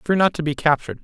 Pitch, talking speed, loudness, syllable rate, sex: 155 Hz, 290 wpm, -20 LUFS, 7.6 syllables/s, male